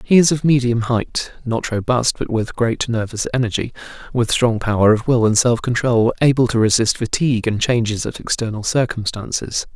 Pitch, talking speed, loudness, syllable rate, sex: 120 Hz, 180 wpm, -18 LUFS, 5.2 syllables/s, male